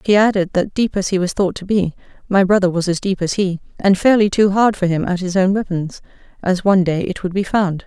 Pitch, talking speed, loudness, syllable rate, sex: 190 Hz, 250 wpm, -17 LUFS, 5.7 syllables/s, female